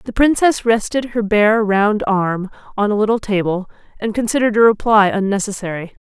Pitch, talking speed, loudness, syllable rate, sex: 210 Hz, 160 wpm, -16 LUFS, 5.3 syllables/s, female